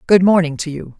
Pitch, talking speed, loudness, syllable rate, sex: 170 Hz, 240 wpm, -16 LUFS, 5.9 syllables/s, female